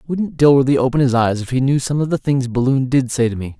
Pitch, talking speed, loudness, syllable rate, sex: 130 Hz, 285 wpm, -16 LUFS, 6.1 syllables/s, male